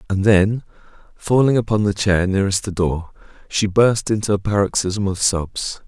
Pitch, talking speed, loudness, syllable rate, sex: 100 Hz, 165 wpm, -18 LUFS, 4.8 syllables/s, male